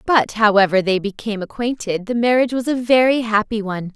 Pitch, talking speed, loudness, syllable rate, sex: 220 Hz, 180 wpm, -18 LUFS, 6.0 syllables/s, female